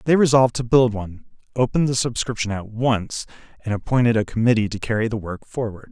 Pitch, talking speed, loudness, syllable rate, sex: 115 Hz, 195 wpm, -21 LUFS, 6.3 syllables/s, male